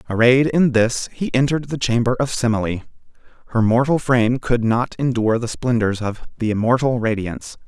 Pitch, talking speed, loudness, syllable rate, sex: 120 Hz, 165 wpm, -19 LUFS, 5.5 syllables/s, male